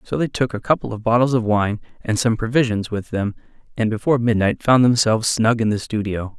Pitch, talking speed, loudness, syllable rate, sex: 115 Hz, 215 wpm, -19 LUFS, 5.8 syllables/s, male